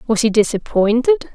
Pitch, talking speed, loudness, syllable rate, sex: 235 Hz, 135 wpm, -16 LUFS, 5.9 syllables/s, female